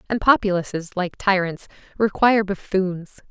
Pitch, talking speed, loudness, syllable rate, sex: 195 Hz, 110 wpm, -21 LUFS, 4.8 syllables/s, female